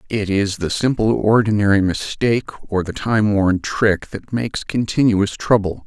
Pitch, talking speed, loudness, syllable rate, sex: 105 Hz, 155 wpm, -18 LUFS, 4.4 syllables/s, male